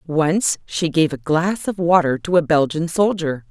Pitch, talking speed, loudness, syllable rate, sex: 165 Hz, 190 wpm, -18 LUFS, 4.3 syllables/s, female